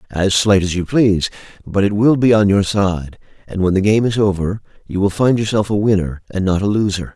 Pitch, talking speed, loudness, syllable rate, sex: 100 Hz, 235 wpm, -16 LUFS, 5.5 syllables/s, male